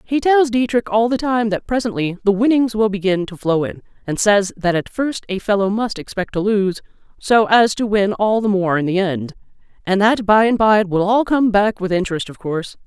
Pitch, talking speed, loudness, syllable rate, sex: 205 Hz, 235 wpm, -17 LUFS, 5.3 syllables/s, female